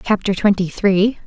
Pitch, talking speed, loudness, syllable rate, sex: 195 Hz, 140 wpm, -17 LUFS, 4.5 syllables/s, female